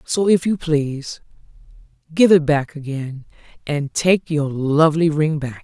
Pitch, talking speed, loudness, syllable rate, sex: 155 Hz, 150 wpm, -18 LUFS, 4.3 syllables/s, female